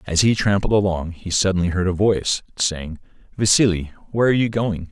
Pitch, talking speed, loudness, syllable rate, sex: 95 Hz, 185 wpm, -20 LUFS, 5.5 syllables/s, male